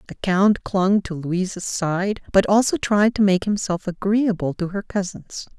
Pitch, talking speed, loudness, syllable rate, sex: 190 Hz, 170 wpm, -21 LUFS, 4.2 syllables/s, female